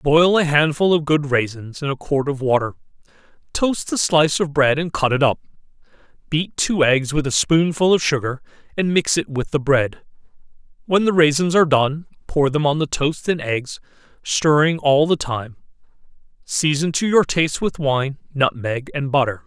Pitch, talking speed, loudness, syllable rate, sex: 150 Hz, 180 wpm, -19 LUFS, 4.8 syllables/s, male